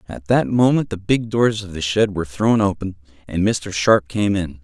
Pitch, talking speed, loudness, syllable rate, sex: 100 Hz, 220 wpm, -19 LUFS, 4.8 syllables/s, male